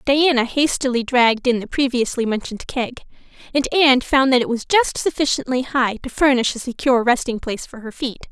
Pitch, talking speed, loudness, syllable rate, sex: 255 Hz, 190 wpm, -19 LUFS, 5.8 syllables/s, female